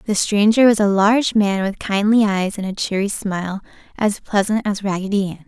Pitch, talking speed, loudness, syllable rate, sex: 205 Hz, 195 wpm, -18 LUFS, 5.5 syllables/s, female